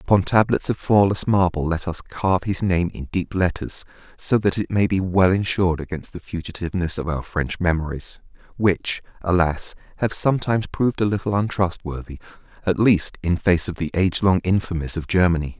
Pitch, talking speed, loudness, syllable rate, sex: 90 Hz, 175 wpm, -21 LUFS, 5.4 syllables/s, male